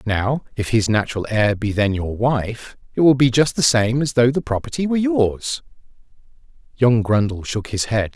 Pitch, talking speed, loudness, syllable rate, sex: 120 Hz, 190 wpm, -19 LUFS, 4.8 syllables/s, male